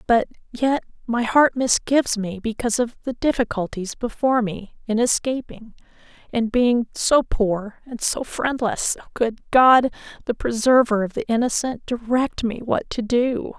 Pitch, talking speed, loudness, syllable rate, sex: 235 Hz, 145 wpm, -21 LUFS, 4.4 syllables/s, female